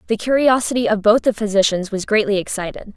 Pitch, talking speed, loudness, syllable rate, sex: 215 Hz, 180 wpm, -17 LUFS, 6.2 syllables/s, female